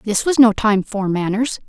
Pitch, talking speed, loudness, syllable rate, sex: 220 Hz, 215 wpm, -17 LUFS, 4.7 syllables/s, female